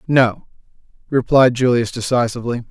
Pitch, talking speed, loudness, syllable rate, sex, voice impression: 120 Hz, 90 wpm, -17 LUFS, 5.4 syllables/s, male, masculine, adult-like, tensed, slightly powerful, slightly bright, clear, sincere, calm, friendly, reassuring, wild, kind